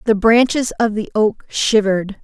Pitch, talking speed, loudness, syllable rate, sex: 215 Hz, 160 wpm, -16 LUFS, 4.7 syllables/s, female